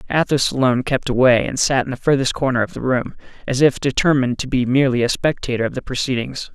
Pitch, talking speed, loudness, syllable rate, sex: 130 Hz, 220 wpm, -18 LUFS, 6.5 syllables/s, male